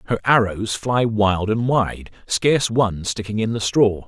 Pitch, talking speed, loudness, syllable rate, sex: 110 Hz, 175 wpm, -20 LUFS, 4.4 syllables/s, male